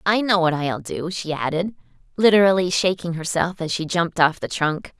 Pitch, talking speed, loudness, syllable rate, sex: 175 Hz, 190 wpm, -21 LUFS, 5.2 syllables/s, female